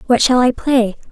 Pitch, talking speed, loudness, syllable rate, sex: 240 Hz, 215 wpm, -14 LUFS, 4.9 syllables/s, female